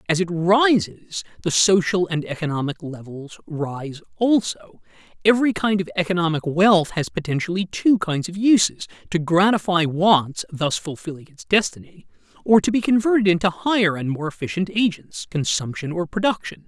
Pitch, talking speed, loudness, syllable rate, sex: 175 Hz, 135 wpm, -20 LUFS, 5.0 syllables/s, male